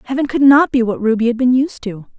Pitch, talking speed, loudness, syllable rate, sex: 245 Hz, 275 wpm, -14 LUFS, 6.3 syllables/s, female